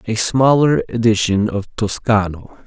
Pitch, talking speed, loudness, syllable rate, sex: 110 Hz, 115 wpm, -16 LUFS, 4.1 syllables/s, male